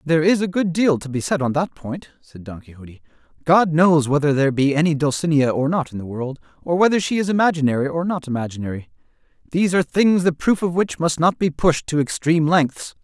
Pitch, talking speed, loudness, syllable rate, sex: 155 Hz, 220 wpm, -19 LUFS, 6.0 syllables/s, male